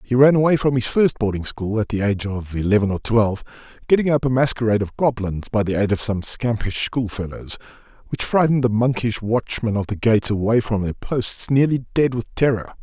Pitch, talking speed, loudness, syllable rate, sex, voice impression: 115 Hz, 205 wpm, -20 LUFS, 5.7 syllables/s, male, very masculine, very adult-like, old, very thick, tensed, very powerful, slightly bright, slightly soft, muffled, fluent, slightly raspy, very cool, intellectual, very sincere, very calm, very mature, friendly, reassuring, unique, slightly elegant, very wild, slightly sweet, lively, very kind, slightly intense